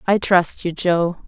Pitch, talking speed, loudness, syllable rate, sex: 175 Hz, 190 wpm, -18 LUFS, 3.5 syllables/s, female